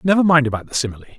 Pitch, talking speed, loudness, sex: 145 Hz, 255 wpm, -18 LUFS, male